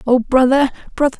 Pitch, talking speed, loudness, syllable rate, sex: 260 Hz, 150 wpm, -15 LUFS, 6.1 syllables/s, female